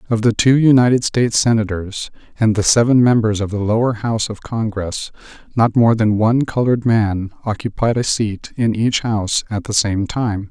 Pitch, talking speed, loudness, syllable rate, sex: 110 Hz, 185 wpm, -17 LUFS, 5.1 syllables/s, male